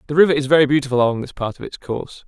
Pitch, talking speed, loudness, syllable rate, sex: 140 Hz, 290 wpm, -18 LUFS, 8.1 syllables/s, male